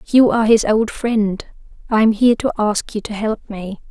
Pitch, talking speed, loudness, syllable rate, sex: 215 Hz, 200 wpm, -17 LUFS, 5.1 syllables/s, female